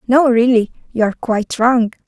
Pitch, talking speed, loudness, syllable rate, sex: 235 Hz, 175 wpm, -15 LUFS, 5.8 syllables/s, female